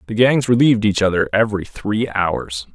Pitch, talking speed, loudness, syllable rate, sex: 105 Hz, 175 wpm, -17 LUFS, 5.2 syllables/s, male